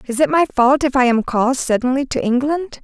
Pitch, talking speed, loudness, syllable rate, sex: 260 Hz, 235 wpm, -16 LUFS, 5.8 syllables/s, female